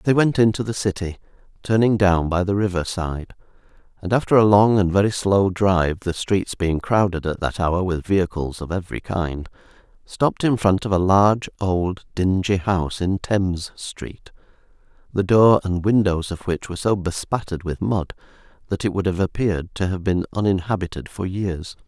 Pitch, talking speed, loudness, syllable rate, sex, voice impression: 95 Hz, 180 wpm, -21 LUFS, 5.1 syllables/s, male, very masculine, very adult-like, middle-aged, thick, relaxed, slightly weak, dark, soft, slightly muffled, slightly fluent, slightly cool, intellectual, sincere, very calm, mature, slightly friendly, slightly reassuring, unique, elegant, slightly wild, slightly sweet, kind, slightly modest